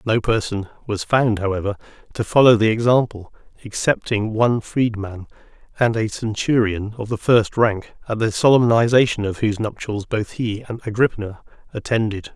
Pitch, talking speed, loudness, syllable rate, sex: 110 Hz, 145 wpm, -19 LUFS, 5.1 syllables/s, male